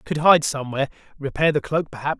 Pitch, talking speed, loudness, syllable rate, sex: 145 Hz, 220 wpm, -21 LUFS, 6.9 syllables/s, male